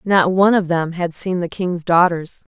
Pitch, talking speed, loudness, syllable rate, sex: 175 Hz, 210 wpm, -17 LUFS, 4.6 syllables/s, female